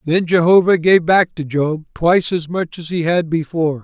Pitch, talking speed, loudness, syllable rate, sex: 165 Hz, 205 wpm, -16 LUFS, 5.0 syllables/s, male